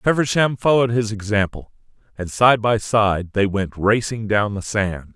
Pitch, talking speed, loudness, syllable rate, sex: 110 Hz, 165 wpm, -19 LUFS, 4.6 syllables/s, male